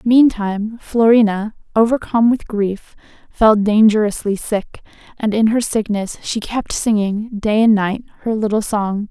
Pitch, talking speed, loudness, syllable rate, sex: 215 Hz, 140 wpm, -17 LUFS, 4.3 syllables/s, female